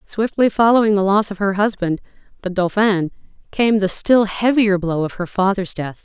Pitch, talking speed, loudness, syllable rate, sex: 200 Hz, 180 wpm, -17 LUFS, 4.9 syllables/s, female